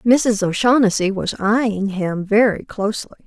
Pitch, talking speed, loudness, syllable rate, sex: 210 Hz, 130 wpm, -18 LUFS, 4.2 syllables/s, female